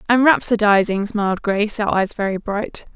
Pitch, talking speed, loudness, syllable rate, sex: 210 Hz, 160 wpm, -18 LUFS, 5.2 syllables/s, female